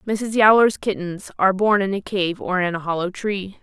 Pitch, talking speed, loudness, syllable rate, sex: 195 Hz, 215 wpm, -20 LUFS, 5.0 syllables/s, female